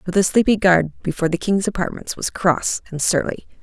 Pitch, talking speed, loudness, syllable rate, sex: 185 Hz, 200 wpm, -19 LUFS, 5.7 syllables/s, female